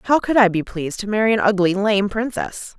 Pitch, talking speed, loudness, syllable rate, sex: 210 Hz, 235 wpm, -19 LUFS, 5.5 syllables/s, female